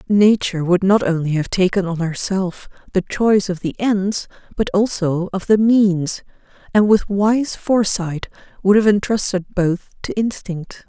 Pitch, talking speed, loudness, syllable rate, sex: 195 Hz, 155 wpm, -18 LUFS, 4.3 syllables/s, female